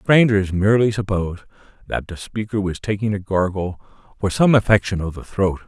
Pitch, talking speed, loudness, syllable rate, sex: 100 Hz, 170 wpm, -20 LUFS, 5.5 syllables/s, male